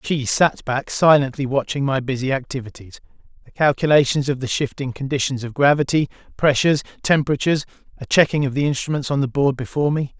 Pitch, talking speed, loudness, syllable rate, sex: 135 Hz, 165 wpm, -19 LUFS, 6.1 syllables/s, male